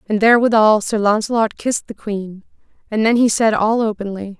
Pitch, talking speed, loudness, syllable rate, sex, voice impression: 215 Hz, 180 wpm, -16 LUFS, 5.5 syllables/s, female, feminine, adult-like, tensed, powerful, bright, clear, fluent, intellectual, calm, friendly, elegant, lively